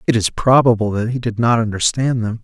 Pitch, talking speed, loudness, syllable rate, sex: 115 Hz, 220 wpm, -16 LUFS, 5.7 syllables/s, male